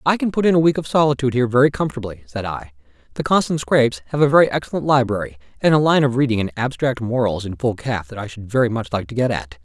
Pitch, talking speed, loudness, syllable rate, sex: 120 Hz, 255 wpm, -19 LUFS, 6.9 syllables/s, male